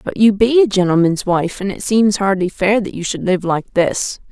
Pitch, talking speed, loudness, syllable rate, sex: 195 Hz, 235 wpm, -16 LUFS, 4.8 syllables/s, female